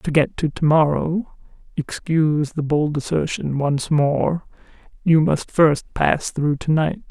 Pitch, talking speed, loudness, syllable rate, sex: 155 Hz, 150 wpm, -20 LUFS, 2.7 syllables/s, female